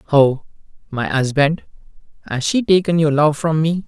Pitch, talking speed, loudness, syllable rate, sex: 150 Hz, 155 wpm, -17 LUFS, 4.7 syllables/s, male